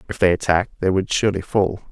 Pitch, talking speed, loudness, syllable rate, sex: 95 Hz, 220 wpm, -20 LUFS, 6.4 syllables/s, male